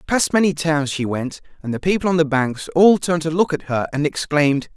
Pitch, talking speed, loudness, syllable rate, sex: 155 Hz, 240 wpm, -19 LUFS, 5.6 syllables/s, male